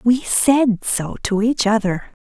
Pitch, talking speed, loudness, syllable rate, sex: 220 Hz, 160 wpm, -18 LUFS, 3.6 syllables/s, female